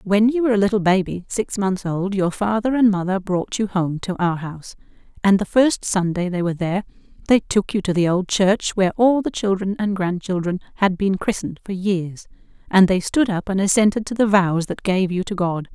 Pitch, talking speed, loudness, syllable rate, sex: 195 Hz, 220 wpm, -20 LUFS, 5.4 syllables/s, female